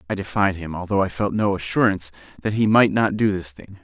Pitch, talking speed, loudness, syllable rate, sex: 95 Hz, 235 wpm, -21 LUFS, 6.0 syllables/s, male